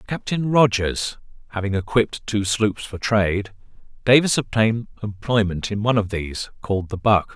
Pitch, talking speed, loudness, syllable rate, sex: 105 Hz, 145 wpm, -21 LUFS, 5.2 syllables/s, male